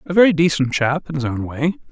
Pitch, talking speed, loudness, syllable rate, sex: 150 Hz, 250 wpm, -18 LUFS, 6.1 syllables/s, male